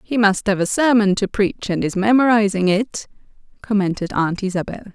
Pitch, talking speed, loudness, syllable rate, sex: 205 Hz, 170 wpm, -18 LUFS, 5.5 syllables/s, female